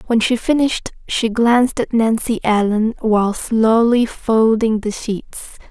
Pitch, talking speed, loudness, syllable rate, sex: 225 Hz, 135 wpm, -16 LUFS, 4.2 syllables/s, female